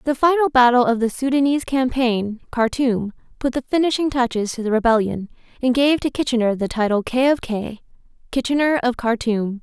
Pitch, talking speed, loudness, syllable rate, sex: 250 Hz, 160 wpm, -19 LUFS, 5.4 syllables/s, female